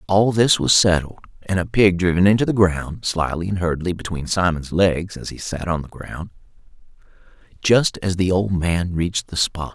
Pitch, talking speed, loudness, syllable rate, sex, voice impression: 90 Hz, 190 wpm, -19 LUFS, 5.0 syllables/s, male, very masculine, very middle-aged, slightly tensed, slightly powerful, bright, soft, muffled, slightly halting, raspy, cool, very intellectual, refreshing, sincere, very calm, mature, very friendly, reassuring, very unique, elegant, very wild, sweet, lively, kind, slightly intense